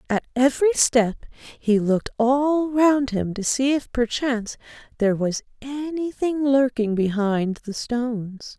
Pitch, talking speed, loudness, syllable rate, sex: 245 Hz, 135 wpm, -22 LUFS, 4.1 syllables/s, female